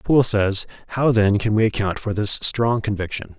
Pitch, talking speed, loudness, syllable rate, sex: 105 Hz, 195 wpm, -19 LUFS, 5.0 syllables/s, male